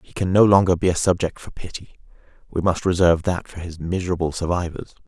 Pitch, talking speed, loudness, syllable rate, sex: 90 Hz, 200 wpm, -20 LUFS, 6.2 syllables/s, male